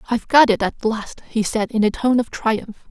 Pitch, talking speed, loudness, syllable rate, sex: 225 Hz, 250 wpm, -19 LUFS, 5.0 syllables/s, female